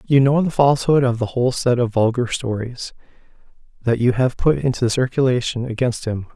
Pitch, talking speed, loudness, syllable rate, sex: 125 Hz, 180 wpm, -19 LUFS, 5.5 syllables/s, male